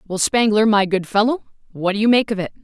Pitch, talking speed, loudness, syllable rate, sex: 210 Hz, 250 wpm, -18 LUFS, 6.3 syllables/s, female